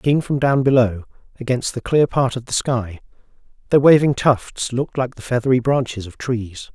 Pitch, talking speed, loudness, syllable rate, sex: 125 Hz, 185 wpm, -18 LUFS, 5.0 syllables/s, male